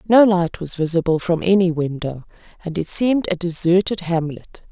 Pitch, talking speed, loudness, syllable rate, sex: 175 Hz, 165 wpm, -19 LUFS, 5.2 syllables/s, female